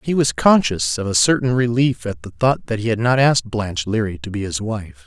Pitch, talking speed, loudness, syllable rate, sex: 110 Hz, 250 wpm, -18 LUFS, 5.5 syllables/s, male